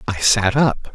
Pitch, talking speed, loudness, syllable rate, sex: 115 Hz, 190 wpm, -17 LUFS, 3.7 syllables/s, male